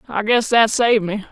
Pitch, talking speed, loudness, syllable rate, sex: 220 Hz, 225 wpm, -16 LUFS, 5.7 syllables/s, female